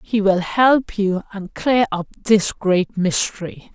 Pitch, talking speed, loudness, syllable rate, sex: 200 Hz, 160 wpm, -18 LUFS, 3.5 syllables/s, female